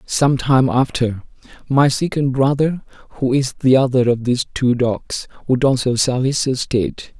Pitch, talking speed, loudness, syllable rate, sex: 130 Hz, 160 wpm, -17 LUFS, 4.5 syllables/s, male